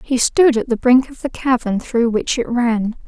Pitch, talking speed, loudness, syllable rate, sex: 245 Hz, 235 wpm, -17 LUFS, 4.1 syllables/s, female